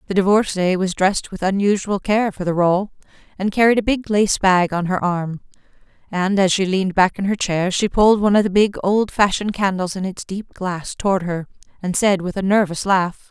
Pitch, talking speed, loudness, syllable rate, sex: 195 Hz, 215 wpm, -18 LUFS, 5.4 syllables/s, female